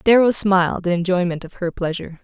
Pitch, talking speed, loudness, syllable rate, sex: 185 Hz, 190 wpm, -19 LUFS, 6.1 syllables/s, female